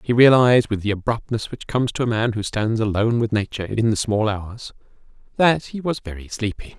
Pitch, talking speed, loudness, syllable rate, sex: 110 Hz, 210 wpm, -20 LUFS, 5.8 syllables/s, male